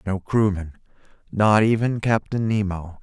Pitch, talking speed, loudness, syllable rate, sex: 105 Hz, 120 wpm, -21 LUFS, 4.2 syllables/s, male